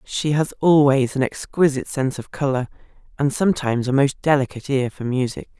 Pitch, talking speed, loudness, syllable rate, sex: 135 Hz, 170 wpm, -20 LUFS, 5.9 syllables/s, female